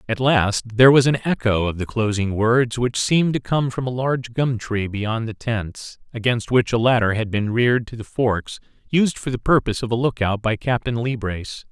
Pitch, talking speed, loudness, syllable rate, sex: 120 Hz, 220 wpm, -20 LUFS, 5.1 syllables/s, male